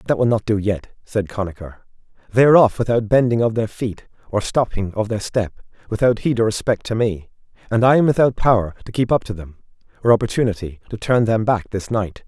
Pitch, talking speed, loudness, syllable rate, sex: 110 Hz, 215 wpm, -19 LUFS, 5.7 syllables/s, male